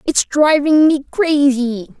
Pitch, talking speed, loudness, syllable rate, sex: 280 Hz, 120 wpm, -14 LUFS, 3.6 syllables/s, female